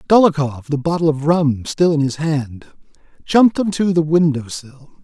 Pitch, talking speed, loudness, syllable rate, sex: 155 Hz, 165 wpm, -17 LUFS, 4.9 syllables/s, male